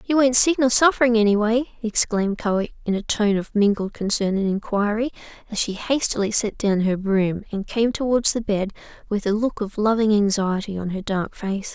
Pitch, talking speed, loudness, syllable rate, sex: 215 Hz, 200 wpm, -21 LUFS, 5.1 syllables/s, female